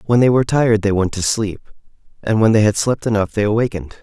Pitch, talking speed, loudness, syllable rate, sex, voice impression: 110 Hz, 240 wpm, -16 LUFS, 6.6 syllables/s, male, masculine, adult-like, tensed, powerful, slightly soft, clear, slightly nasal, cool, intellectual, calm, friendly, reassuring, slightly wild, lively, kind